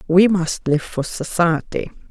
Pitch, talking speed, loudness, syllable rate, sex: 170 Hz, 145 wpm, -19 LUFS, 3.9 syllables/s, female